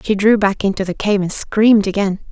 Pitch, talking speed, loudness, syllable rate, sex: 200 Hz, 235 wpm, -15 LUFS, 5.7 syllables/s, female